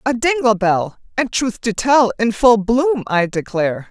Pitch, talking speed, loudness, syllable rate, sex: 230 Hz, 185 wpm, -17 LUFS, 4.3 syllables/s, female